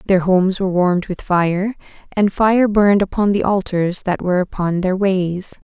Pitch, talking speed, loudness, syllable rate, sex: 190 Hz, 180 wpm, -17 LUFS, 5.0 syllables/s, female